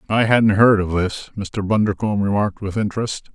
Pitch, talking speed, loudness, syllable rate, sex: 100 Hz, 180 wpm, -19 LUFS, 5.7 syllables/s, male